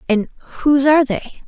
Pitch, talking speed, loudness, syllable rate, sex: 265 Hz, 165 wpm, -16 LUFS, 6.7 syllables/s, female